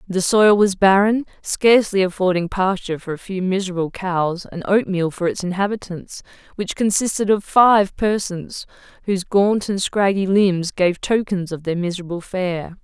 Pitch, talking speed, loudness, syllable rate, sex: 190 Hz, 155 wpm, -19 LUFS, 4.8 syllables/s, female